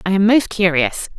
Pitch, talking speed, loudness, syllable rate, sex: 195 Hz, 205 wpm, -16 LUFS, 4.9 syllables/s, female